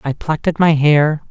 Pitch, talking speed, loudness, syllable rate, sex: 150 Hz, 230 wpm, -15 LUFS, 5.2 syllables/s, male